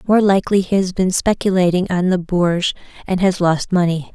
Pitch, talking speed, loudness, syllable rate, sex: 185 Hz, 190 wpm, -17 LUFS, 5.4 syllables/s, female